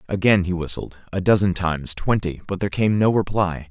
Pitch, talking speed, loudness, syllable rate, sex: 95 Hz, 195 wpm, -21 LUFS, 5.7 syllables/s, male